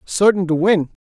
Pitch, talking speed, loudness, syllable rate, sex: 180 Hz, 175 wpm, -16 LUFS, 4.8 syllables/s, male